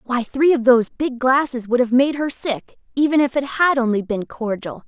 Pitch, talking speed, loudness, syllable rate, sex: 255 Hz, 220 wpm, -19 LUFS, 5.1 syllables/s, female